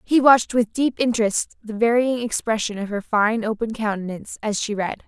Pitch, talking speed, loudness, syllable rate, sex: 220 Hz, 190 wpm, -21 LUFS, 5.3 syllables/s, female